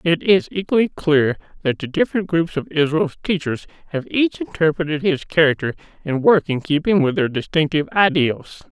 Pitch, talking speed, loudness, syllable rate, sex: 160 Hz, 165 wpm, -19 LUFS, 5.2 syllables/s, male